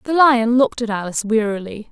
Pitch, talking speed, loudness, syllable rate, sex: 230 Hz, 190 wpm, -17 LUFS, 6.3 syllables/s, female